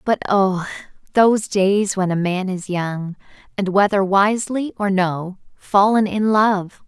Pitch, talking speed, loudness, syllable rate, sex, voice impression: 200 Hz, 150 wpm, -18 LUFS, 4.0 syllables/s, female, feminine, slightly adult-like, clear, slightly cute, slightly friendly, slightly lively